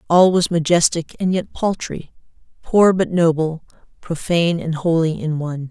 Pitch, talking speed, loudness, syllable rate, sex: 165 Hz, 145 wpm, -18 LUFS, 4.7 syllables/s, female